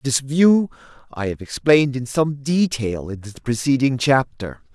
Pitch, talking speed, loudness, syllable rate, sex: 130 Hz, 150 wpm, -19 LUFS, 4.4 syllables/s, male